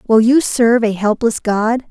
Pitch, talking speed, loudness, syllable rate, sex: 230 Hz, 190 wpm, -14 LUFS, 4.3 syllables/s, female